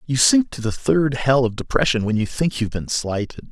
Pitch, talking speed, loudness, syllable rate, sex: 130 Hz, 240 wpm, -20 LUFS, 5.3 syllables/s, male